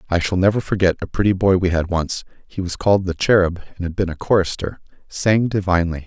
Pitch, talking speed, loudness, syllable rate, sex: 90 Hz, 210 wpm, -19 LUFS, 6.1 syllables/s, male